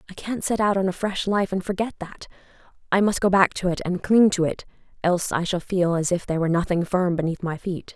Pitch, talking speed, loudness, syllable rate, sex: 185 Hz, 255 wpm, -23 LUFS, 6.0 syllables/s, female